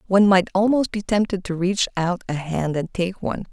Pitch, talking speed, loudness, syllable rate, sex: 190 Hz, 220 wpm, -21 LUFS, 5.5 syllables/s, female